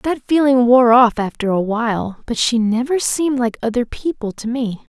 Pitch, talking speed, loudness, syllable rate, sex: 245 Hz, 190 wpm, -17 LUFS, 4.9 syllables/s, female